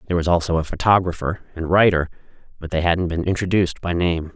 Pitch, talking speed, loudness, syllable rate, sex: 85 Hz, 195 wpm, -20 LUFS, 6.6 syllables/s, male